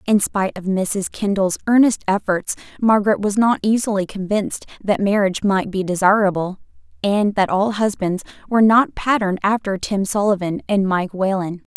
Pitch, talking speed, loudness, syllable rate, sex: 200 Hz, 155 wpm, -19 LUFS, 5.2 syllables/s, female